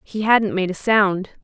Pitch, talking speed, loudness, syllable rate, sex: 200 Hz, 210 wpm, -18 LUFS, 4.1 syllables/s, female